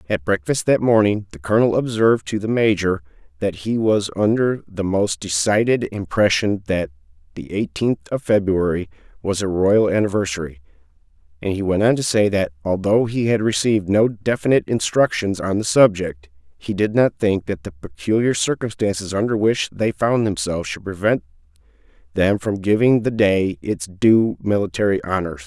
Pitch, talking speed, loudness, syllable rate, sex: 100 Hz, 160 wpm, -19 LUFS, 5.1 syllables/s, male